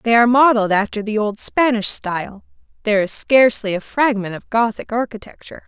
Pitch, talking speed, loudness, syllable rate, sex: 225 Hz, 170 wpm, -17 LUFS, 5.9 syllables/s, female